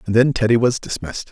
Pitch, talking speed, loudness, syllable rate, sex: 115 Hz, 230 wpm, -18 LUFS, 6.7 syllables/s, male